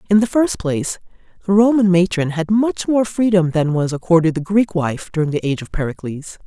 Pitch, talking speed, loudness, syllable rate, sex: 180 Hz, 205 wpm, -17 LUFS, 5.6 syllables/s, female